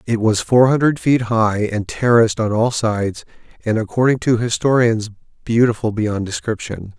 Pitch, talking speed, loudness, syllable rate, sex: 115 Hz, 155 wpm, -17 LUFS, 4.9 syllables/s, male